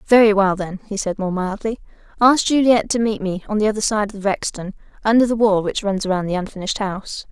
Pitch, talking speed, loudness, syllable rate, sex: 205 Hz, 220 wpm, -19 LUFS, 5.8 syllables/s, female